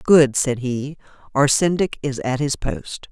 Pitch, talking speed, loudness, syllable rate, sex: 140 Hz, 175 wpm, -20 LUFS, 3.8 syllables/s, female